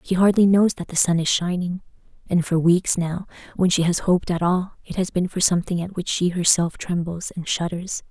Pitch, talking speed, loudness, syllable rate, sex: 175 Hz, 220 wpm, -21 LUFS, 5.4 syllables/s, female